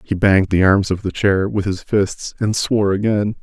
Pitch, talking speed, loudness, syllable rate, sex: 100 Hz, 230 wpm, -17 LUFS, 4.9 syllables/s, male